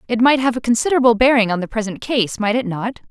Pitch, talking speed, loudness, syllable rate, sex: 230 Hz, 250 wpm, -17 LUFS, 6.7 syllables/s, female